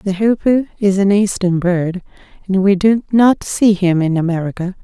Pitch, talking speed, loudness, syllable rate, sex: 195 Hz, 175 wpm, -15 LUFS, 4.7 syllables/s, female